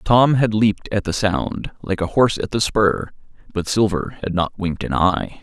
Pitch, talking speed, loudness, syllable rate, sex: 100 Hz, 210 wpm, -19 LUFS, 4.9 syllables/s, male